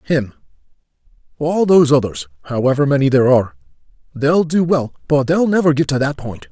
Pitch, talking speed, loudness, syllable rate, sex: 140 Hz, 155 wpm, -16 LUFS, 6.1 syllables/s, male